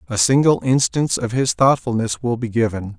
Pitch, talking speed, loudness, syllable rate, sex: 120 Hz, 180 wpm, -18 LUFS, 5.3 syllables/s, male